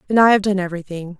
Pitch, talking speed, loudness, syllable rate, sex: 190 Hz, 250 wpm, -17 LUFS, 7.9 syllables/s, female